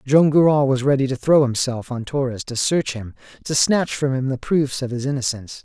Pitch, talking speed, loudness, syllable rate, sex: 135 Hz, 225 wpm, -20 LUFS, 5.3 syllables/s, male